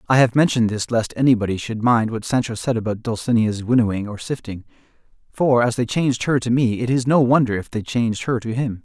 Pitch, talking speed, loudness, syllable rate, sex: 115 Hz, 225 wpm, -20 LUFS, 6.0 syllables/s, male